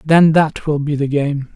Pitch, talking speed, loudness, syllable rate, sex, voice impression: 150 Hz, 230 wpm, -16 LUFS, 4.2 syllables/s, male, masculine, slightly middle-aged, relaxed, slightly weak, slightly muffled, calm, slightly friendly, modest